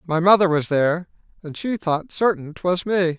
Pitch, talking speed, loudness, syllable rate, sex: 175 Hz, 190 wpm, -20 LUFS, 4.8 syllables/s, male